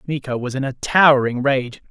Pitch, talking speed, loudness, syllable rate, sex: 135 Hz, 190 wpm, -18 LUFS, 5.3 syllables/s, male